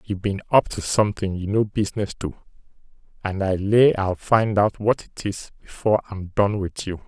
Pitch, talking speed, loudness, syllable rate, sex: 100 Hz, 195 wpm, -22 LUFS, 5.0 syllables/s, male